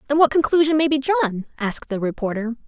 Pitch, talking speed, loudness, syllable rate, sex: 255 Hz, 200 wpm, -20 LUFS, 6.2 syllables/s, female